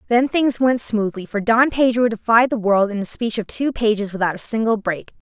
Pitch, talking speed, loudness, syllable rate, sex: 225 Hz, 225 wpm, -19 LUFS, 5.3 syllables/s, female